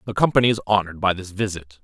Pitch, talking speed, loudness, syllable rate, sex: 100 Hz, 230 wpm, -21 LUFS, 7.4 syllables/s, male